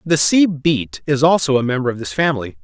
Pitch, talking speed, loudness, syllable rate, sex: 135 Hz, 230 wpm, -16 LUFS, 5.7 syllables/s, male